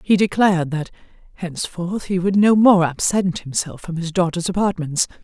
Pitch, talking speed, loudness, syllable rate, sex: 180 Hz, 160 wpm, -19 LUFS, 5.1 syllables/s, female